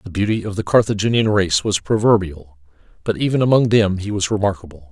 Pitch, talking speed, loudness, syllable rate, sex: 100 Hz, 185 wpm, -17 LUFS, 6.0 syllables/s, male